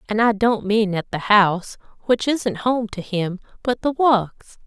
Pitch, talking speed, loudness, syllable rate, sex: 215 Hz, 195 wpm, -20 LUFS, 4.2 syllables/s, female